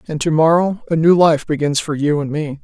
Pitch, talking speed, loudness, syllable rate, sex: 155 Hz, 250 wpm, -16 LUFS, 5.4 syllables/s, female